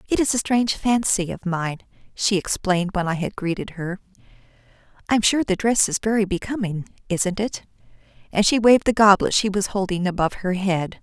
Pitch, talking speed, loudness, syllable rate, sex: 195 Hz, 180 wpm, -21 LUFS, 5.5 syllables/s, female